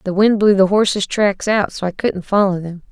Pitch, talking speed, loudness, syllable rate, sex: 195 Hz, 245 wpm, -16 LUFS, 5.1 syllables/s, female